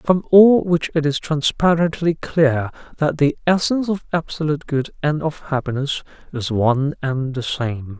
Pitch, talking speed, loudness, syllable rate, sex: 150 Hz, 160 wpm, -19 LUFS, 4.6 syllables/s, male